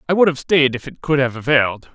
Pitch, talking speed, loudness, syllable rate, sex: 140 Hz, 275 wpm, -17 LUFS, 6.2 syllables/s, male